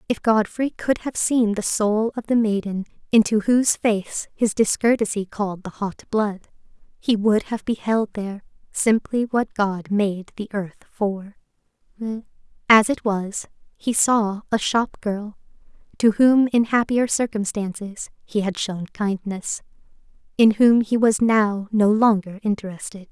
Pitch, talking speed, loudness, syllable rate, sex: 215 Hz, 145 wpm, -21 LUFS, 4.2 syllables/s, female